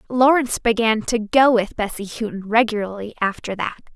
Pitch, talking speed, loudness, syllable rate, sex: 225 Hz, 150 wpm, -20 LUFS, 5.4 syllables/s, female